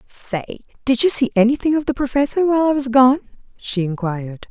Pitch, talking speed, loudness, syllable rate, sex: 250 Hz, 185 wpm, -18 LUFS, 5.7 syllables/s, female